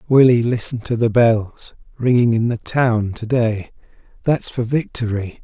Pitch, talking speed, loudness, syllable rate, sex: 115 Hz, 155 wpm, -18 LUFS, 4.2 syllables/s, male